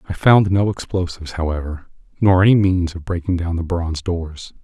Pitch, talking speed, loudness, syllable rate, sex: 90 Hz, 180 wpm, -18 LUFS, 5.4 syllables/s, male